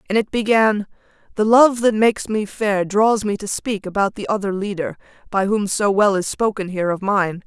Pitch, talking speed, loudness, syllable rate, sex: 205 Hz, 210 wpm, -19 LUFS, 5.1 syllables/s, female